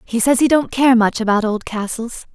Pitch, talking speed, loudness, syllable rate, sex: 235 Hz, 230 wpm, -16 LUFS, 5.1 syllables/s, female